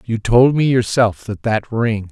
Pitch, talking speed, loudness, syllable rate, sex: 115 Hz, 200 wpm, -16 LUFS, 4.0 syllables/s, male